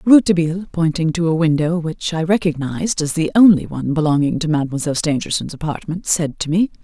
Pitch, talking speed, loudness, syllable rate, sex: 165 Hz, 175 wpm, -18 LUFS, 6.3 syllables/s, female